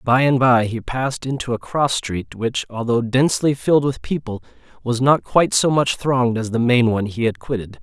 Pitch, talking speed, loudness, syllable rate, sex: 125 Hz, 215 wpm, -19 LUFS, 5.4 syllables/s, male